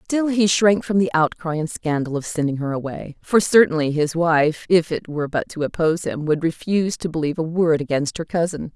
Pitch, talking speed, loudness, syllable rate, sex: 165 Hz, 220 wpm, -20 LUFS, 5.5 syllables/s, female